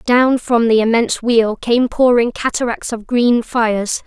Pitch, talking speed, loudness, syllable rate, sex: 235 Hz, 160 wpm, -15 LUFS, 4.2 syllables/s, female